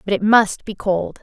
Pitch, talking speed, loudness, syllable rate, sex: 205 Hz, 245 wpm, -17 LUFS, 4.5 syllables/s, female